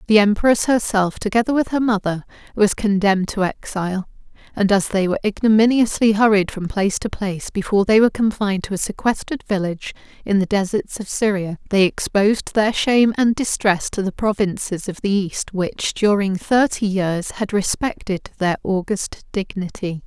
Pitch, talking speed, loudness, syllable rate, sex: 205 Hz, 165 wpm, -19 LUFS, 5.3 syllables/s, female